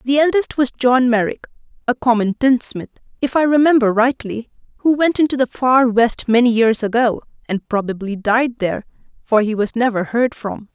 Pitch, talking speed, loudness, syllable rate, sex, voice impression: 240 Hz, 175 wpm, -17 LUFS, 5.1 syllables/s, female, very feminine, slightly young, slightly adult-like, very thin, slightly tensed, slightly weak, slightly dark, slightly hard, very clear, very fluent, slightly raspy, cute, intellectual, very refreshing, slightly sincere, slightly calm, friendly, reassuring, unique, slightly elegant, sweet, lively, strict, slightly intense, sharp, light